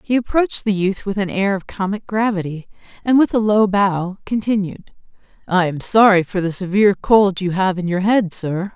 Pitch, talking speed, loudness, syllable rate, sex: 195 Hz, 200 wpm, -18 LUFS, 5.1 syllables/s, female